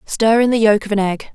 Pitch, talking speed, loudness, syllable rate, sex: 215 Hz, 310 wpm, -15 LUFS, 5.8 syllables/s, female